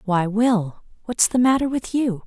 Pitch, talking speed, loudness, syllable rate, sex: 220 Hz, 185 wpm, -20 LUFS, 4.2 syllables/s, female